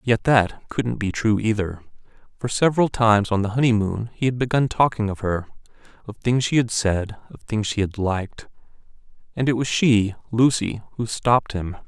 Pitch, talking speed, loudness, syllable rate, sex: 110 Hz, 180 wpm, -21 LUFS, 5.1 syllables/s, male